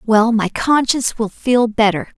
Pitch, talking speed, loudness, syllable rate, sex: 225 Hz, 165 wpm, -16 LUFS, 4.2 syllables/s, female